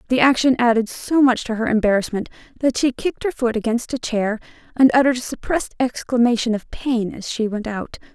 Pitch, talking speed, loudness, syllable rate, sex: 240 Hz, 200 wpm, -20 LUFS, 5.8 syllables/s, female